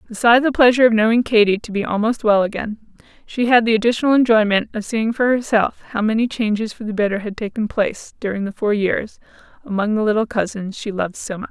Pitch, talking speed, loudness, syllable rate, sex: 220 Hz, 215 wpm, -18 LUFS, 6.2 syllables/s, female